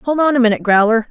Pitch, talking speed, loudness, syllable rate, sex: 245 Hz, 270 wpm, -14 LUFS, 7.5 syllables/s, female